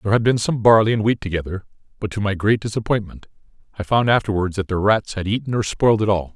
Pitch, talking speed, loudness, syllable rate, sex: 105 Hz, 235 wpm, -19 LUFS, 6.6 syllables/s, male